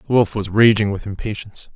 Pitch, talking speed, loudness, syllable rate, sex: 105 Hz, 205 wpm, -18 LUFS, 6.5 syllables/s, male